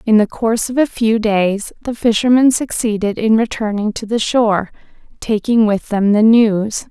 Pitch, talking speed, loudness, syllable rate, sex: 220 Hz, 175 wpm, -15 LUFS, 4.7 syllables/s, female